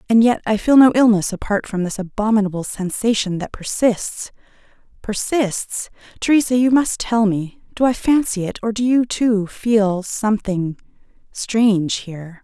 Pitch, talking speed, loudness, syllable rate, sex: 215 Hz, 135 wpm, -18 LUFS, 4.6 syllables/s, female